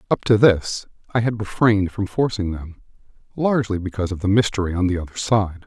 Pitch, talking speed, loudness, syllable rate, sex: 100 Hz, 190 wpm, -20 LUFS, 6.1 syllables/s, male